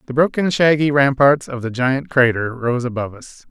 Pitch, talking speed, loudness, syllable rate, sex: 130 Hz, 190 wpm, -17 LUFS, 5.2 syllables/s, male